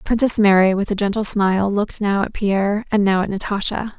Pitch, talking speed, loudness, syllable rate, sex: 200 Hz, 210 wpm, -18 LUFS, 5.7 syllables/s, female